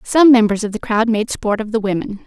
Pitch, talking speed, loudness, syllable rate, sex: 220 Hz, 265 wpm, -16 LUFS, 5.6 syllables/s, female